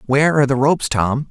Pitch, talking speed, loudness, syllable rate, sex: 135 Hz, 230 wpm, -16 LUFS, 7.0 syllables/s, male